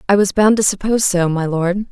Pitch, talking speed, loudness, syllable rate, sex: 195 Hz, 250 wpm, -15 LUFS, 5.8 syllables/s, female